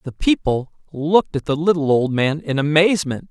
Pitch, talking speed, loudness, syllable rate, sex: 155 Hz, 180 wpm, -18 LUFS, 5.4 syllables/s, male